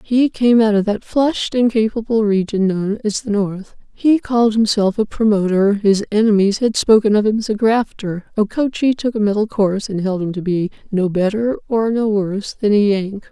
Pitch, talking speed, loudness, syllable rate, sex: 210 Hz, 205 wpm, -17 LUFS, 5.1 syllables/s, female